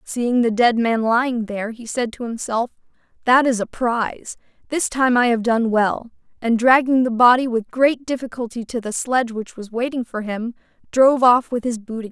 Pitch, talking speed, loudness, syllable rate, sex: 235 Hz, 200 wpm, -19 LUFS, 5.1 syllables/s, female